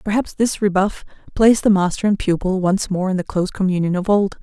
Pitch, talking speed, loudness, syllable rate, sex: 195 Hz, 215 wpm, -18 LUFS, 5.9 syllables/s, female